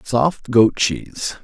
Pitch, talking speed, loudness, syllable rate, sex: 120 Hz, 125 wpm, -18 LUFS, 3.1 syllables/s, male